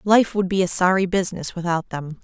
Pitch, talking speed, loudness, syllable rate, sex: 185 Hz, 215 wpm, -21 LUFS, 5.6 syllables/s, female